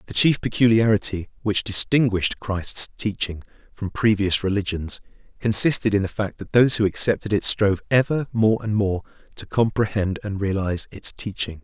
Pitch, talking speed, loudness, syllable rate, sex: 105 Hz, 155 wpm, -21 LUFS, 5.3 syllables/s, male